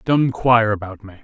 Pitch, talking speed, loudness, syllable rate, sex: 110 Hz, 195 wpm, -17 LUFS, 6.6 syllables/s, male